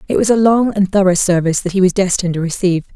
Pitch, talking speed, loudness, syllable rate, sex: 190 Hz, 265 wpm, -14 LUFS, 7.4 syllables/s, female